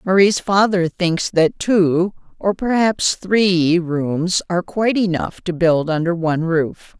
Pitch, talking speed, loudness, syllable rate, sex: 180 Hz, 145 wpm, -18 LUFS, 3.9 syllables/s, female